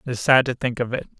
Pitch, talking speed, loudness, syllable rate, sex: 125 Hz, 350 wpm, -20 LUFS, 7.2 syllables/s, male